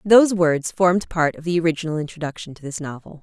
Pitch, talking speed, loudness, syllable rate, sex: 165 Hz, 205 wpm, -21 LUFS, 6.5 syllables/s, female